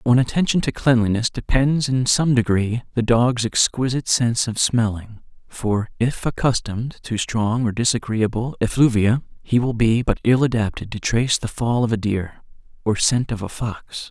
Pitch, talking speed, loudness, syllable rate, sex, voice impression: 115 Hz, 170 wpm, -20 LUFS, 4.9 syllables/s, male, masculine, adult-like, relaxed, weak, slightly dark, slightly muffled, intellectual, slightly refreshing, calm, slightly friendly, kind, modest